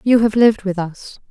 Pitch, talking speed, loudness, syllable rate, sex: 210 Hz, 230 wpm, -16 LUFS, 5.3 syllables/s, female